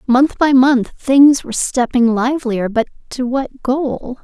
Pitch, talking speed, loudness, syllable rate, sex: 255 Hz, 155 wpm, -15 LUFS, 3.9 syllables/s, female